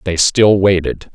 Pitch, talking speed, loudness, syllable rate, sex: 90 Hz, 155 wpm, -12 LUFS, 3.9 syllables/s, male